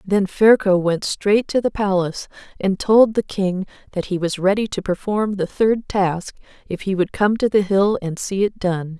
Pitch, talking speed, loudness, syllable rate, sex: 195 Hz, 205 wpm, -19 LUFS, 4.5 syllables/s, female